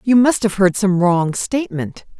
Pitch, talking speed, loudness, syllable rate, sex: 200 Hz, 190 wpm, -17 LUFS, 4.5 syllables/s, female